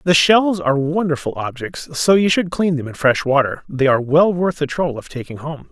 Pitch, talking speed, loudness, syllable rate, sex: 155 Hz, 230 wpm, -17 LUFS, 5.4 syllables/s, male